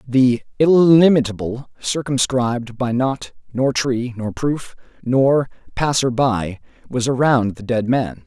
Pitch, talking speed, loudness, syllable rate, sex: 125 Hz, 125 wpm, -18 LUFS, 3.9 syllables/s, male